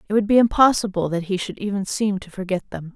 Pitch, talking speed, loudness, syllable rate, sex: 200 Hz, 245 wpm, -21 LUFS, 6.1 syllables/s, female